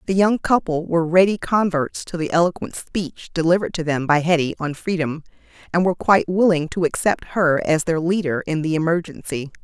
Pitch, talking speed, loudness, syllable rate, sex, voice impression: 170 Hz, 185 wpm, -20 LUFS, 5.6 syllables/s, female, feminine, adult-like, tensed, powerful, clear, intellectual, calm, friendly, elegant, lively, slightly sharp